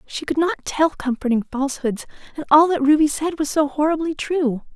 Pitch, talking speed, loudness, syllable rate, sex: 295 Hz, 190 wpm, -20 LUFS, 5.4 syllables/s, female